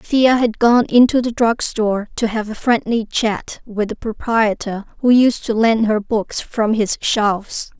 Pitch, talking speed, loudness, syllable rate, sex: 225 Hz, 185 wpm, -17 LUFS, 4.1 syllables/s, female